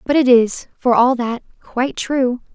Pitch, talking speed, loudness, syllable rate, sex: 250 Hz, 190 wpm, -17 LUFS, 4.4 syllables/s, female